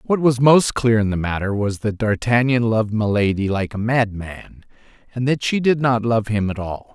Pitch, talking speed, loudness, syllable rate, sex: 115 Hz, 205 wpm, -19 LUFS, 4.9 syllables/s, male